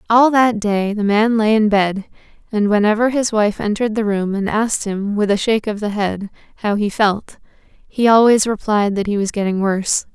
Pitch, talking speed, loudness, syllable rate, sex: 210 Hz, 205 wpm, -17 LUFS, 5.2 syllables/s, female